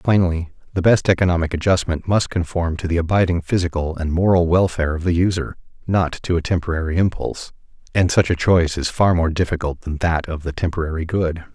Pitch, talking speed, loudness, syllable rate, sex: 85 Hz, 185 wpm, -19 LUFS, 6.0 syllables/s, male